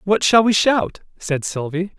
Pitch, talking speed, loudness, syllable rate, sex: 185 Hz, 180 wpm, -18 LUFS, 4.2 syllables/s, male